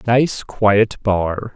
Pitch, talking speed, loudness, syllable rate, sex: 110 Hz, 115 wpm, -17 LUFS, 2.2 syllables/s, male